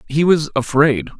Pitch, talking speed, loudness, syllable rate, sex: 150 Hz, 150 wpm, -16 LUFS, 4.4 syllables/s, male